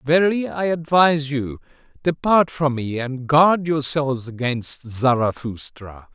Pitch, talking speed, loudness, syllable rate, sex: 140 Hz, 115 wpm, -20 LUFS, 4.1 syllables/s, male